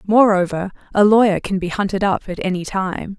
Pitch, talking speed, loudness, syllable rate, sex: 195 Hz, 190 wpm, -18 LUFS, 5.3 syllables/s, female